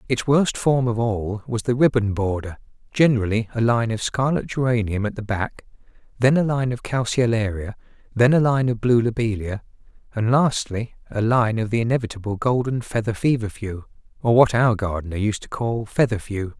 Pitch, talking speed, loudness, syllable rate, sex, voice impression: 115 Hz, 170 wpm, -21 LUFS, 5.2 syllables/s, male, masculine, adult-like, tensed, powerful, bright, raspy, intellectual, calm, mature, friendly, reassuring, wild, strict